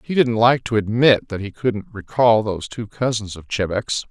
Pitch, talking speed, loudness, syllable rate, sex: 110 Hz, 205 wpm, -19 LUFS, 4.8 syllables/s, male